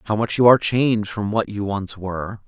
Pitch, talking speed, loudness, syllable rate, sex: 105 Hz, 240 wpm, -20 LUFS, 5.8 syllables/s, male